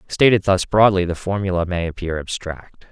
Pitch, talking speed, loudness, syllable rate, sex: 95 Hz, 165 wpm, -19 LUFS, 5.1 syllables/s, male